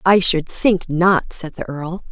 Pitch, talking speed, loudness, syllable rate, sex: 175 Hz, 200 wpm, -18 LUFS, 3.7 syllables/s, female